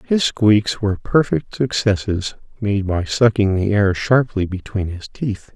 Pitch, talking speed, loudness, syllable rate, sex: 105 Hz, 140 wpm, -19 LUFS, 4.1 syllables/s, male